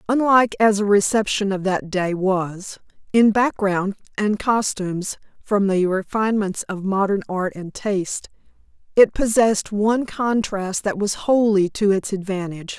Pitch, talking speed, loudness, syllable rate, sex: 200 Hz, 140 wpm, -20 LUFS, 4.5 syllables/s, female